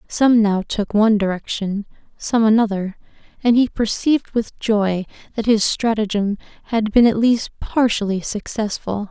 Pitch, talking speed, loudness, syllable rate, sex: 215 Hz, 140 wpm, -19 LUFS, 4.5 syllables/s, female